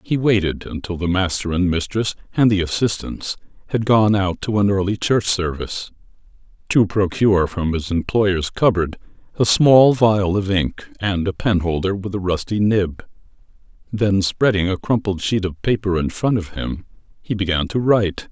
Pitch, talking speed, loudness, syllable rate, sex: 100 Hz, 165 wpm, -19 LUFS, 4.7 syllables/s, male